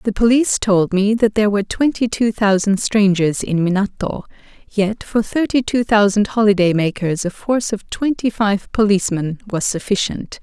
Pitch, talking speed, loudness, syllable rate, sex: 210 Hz, 160 wpm, -17 LUFS, 5.0 syllables/s, female